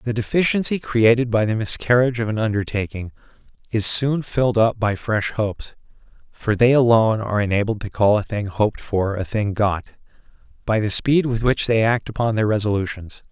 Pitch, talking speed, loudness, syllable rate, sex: 110 Hz, 180 wpm, -20 LUFS, 5.5 syllables/s, male